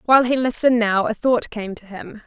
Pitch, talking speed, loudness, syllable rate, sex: 230 Hz, 240 wpm, -19 LUFS, 5.7 syllables/s, female